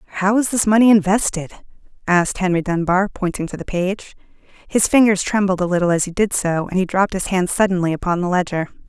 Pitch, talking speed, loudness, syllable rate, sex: 190 Hz, 205 wpm, -18 LUFS, 6.2 syllables/s, female